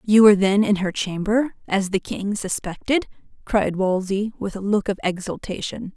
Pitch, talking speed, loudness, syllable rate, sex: 200 Hz, 170 wpm, -22 LUFS, 4.7 syllables/s, female